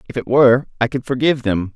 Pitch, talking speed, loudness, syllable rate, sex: 120 Hz, 240 wpm, -17 LUFS, 6.9 syllables/s, male